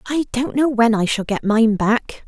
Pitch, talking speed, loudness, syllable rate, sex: 235 Hz, 240 wpm, -18 LUFS, 4.3 syllables/s, female